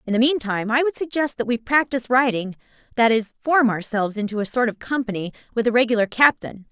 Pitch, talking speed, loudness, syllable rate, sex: 235 Hz, 195 wpm, -21 LUFS, 6.3 syllables/s, female